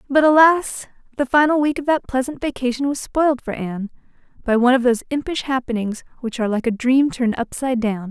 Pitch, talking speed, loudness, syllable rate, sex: 260 Hz, 200 wpm, -19 LUFS, 6.3 syllables/s, female